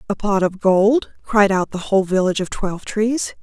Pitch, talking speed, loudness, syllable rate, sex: 200 Hz, 210 wpm, -18 LUFS, 5.1 syllables/s, female